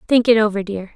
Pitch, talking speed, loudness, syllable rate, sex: 215 Hz, 250 wpm, -16 LUFS, 6.3 syllables/s, female